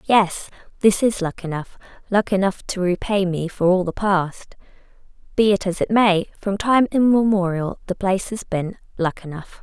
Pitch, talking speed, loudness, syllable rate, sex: 190 Hz, 170 wpm, -20 LUFS, 4.7 syllables/s, female